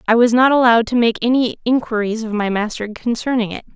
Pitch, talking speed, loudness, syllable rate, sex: 235 Hz, 210 wpm, -17 LUFS, 6.3 syllables/s, female